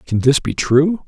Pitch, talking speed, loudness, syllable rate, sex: 145 Hz, 220 wpm, -16 LUFS, 4.4 syllables/s, male